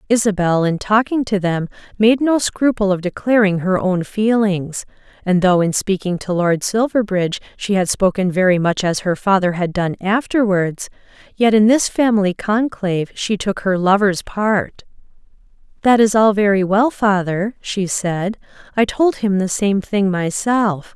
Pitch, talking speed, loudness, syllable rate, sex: 200 Hz, 160 wpm, -17 LUFS, 4.5 syllables/s, female